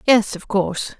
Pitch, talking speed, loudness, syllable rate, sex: 205 Hz, 180 wpm, -20 LUFS, 4.8 syllables/s, female